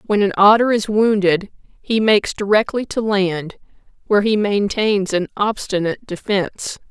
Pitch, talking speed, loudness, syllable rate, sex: 205 Hz, 140 wpm, -17 LUFS, 4.9 syllables/s, female